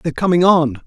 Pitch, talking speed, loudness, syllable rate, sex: 160 Hz, 210 wpm, -14 LUFS, 6.7 syllables/s, male